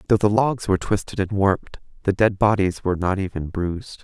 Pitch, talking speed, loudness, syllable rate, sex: 100 Hz, 210 wpm, -22 LUFS, 5.9 syllables/s, male